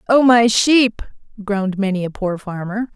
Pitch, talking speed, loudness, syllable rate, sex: 210 Hz, 165 wpm, -17 LUFS, 4.6 syllables/s, female